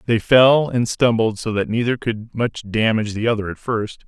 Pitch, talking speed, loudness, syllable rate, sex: 115 Hz, 205 wpm, -19 LUFS, 5.0 syllables/s, male